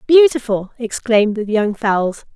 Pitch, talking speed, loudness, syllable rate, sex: 230 Hz, 125 wpm, -17 LUFS, 4.3 syllables/s, female